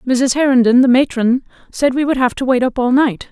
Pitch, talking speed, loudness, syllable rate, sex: 255 Hz, 235 wpm, -14 LUFS, 5.2 syllables/s, female